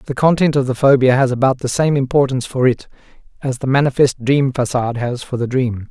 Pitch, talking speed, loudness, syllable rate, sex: 130 Hz, 215 wpm, -16 LUFS, 5.8 syllables/s, male